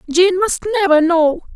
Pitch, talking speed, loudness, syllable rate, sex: 350 Hz, 155 wpm, -14 LUFS, 6.0 syllables/s, female